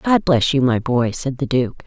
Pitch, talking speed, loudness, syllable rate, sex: 135 Hz, 255 wpm, -18 LUFS, 4.6 syllables/s, female